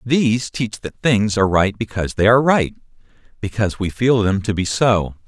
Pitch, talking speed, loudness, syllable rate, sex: 110 Hz, 195 wpm, -18 LUFS, 5.4 syllables/s, male